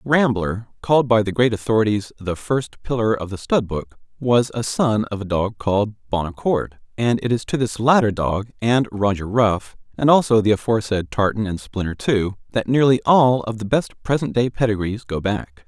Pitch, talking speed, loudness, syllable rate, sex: 110 Hz, 190 wpm, -20 LUFS, 4.9 syllables/s, male